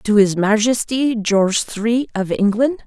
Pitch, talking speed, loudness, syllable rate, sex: 220 Hz, 145 wpm, -17 LUFS, 4.0 syllables/s, female